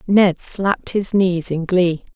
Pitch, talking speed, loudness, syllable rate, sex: 185 Hz, 165 wpm, -18 LUFS, 3.6 syllables/s, female